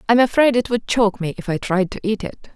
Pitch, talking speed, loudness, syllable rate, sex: 220 Hz, 280 wpm, -19 LUFS, 6.0 syllables/s, female